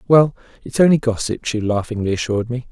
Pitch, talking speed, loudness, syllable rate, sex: 120 Hz, 175 wpm, -19 LUFS, 6.2 syllables/s, male